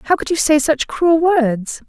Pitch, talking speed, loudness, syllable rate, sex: 300 Hz, 225 wpm, -15 LUFS, 3.9 syllables/s, female